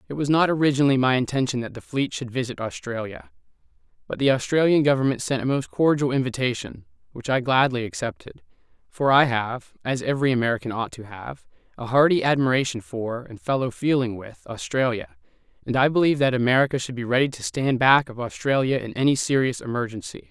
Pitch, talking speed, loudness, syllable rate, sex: 130 Hz, 175 wpm, -22 LUFS, 6.0 syllables/s, male